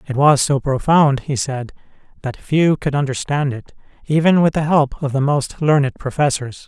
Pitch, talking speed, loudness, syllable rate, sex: 140 Hz, 180 wpm, -17 LUFS, 4.7 syllables/s, male